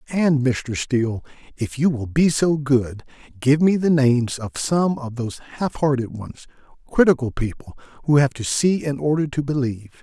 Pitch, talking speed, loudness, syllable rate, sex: 135 Hz, 170 wpm, -21 LUFS, 4.9 syllables/s, male